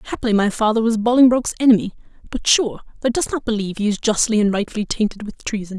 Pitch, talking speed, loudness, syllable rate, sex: 220 Hz, 205 wpm, -18 LUFS, 6.8 syllables/s, female